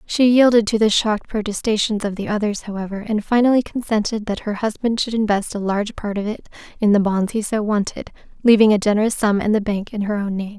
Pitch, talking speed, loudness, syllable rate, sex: 215 Hz, 225 wpm, -19 LUFS, 6.0 syllables/s, female